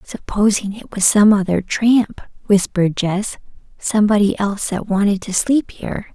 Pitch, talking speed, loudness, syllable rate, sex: 205 Hz, 145 wpm, -17 LUFS, 4.8 syllables/s, female